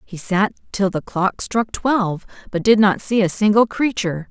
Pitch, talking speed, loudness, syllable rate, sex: 205 Hz, 195 wpm, -19 LUFS, 4.8 syllables/s, female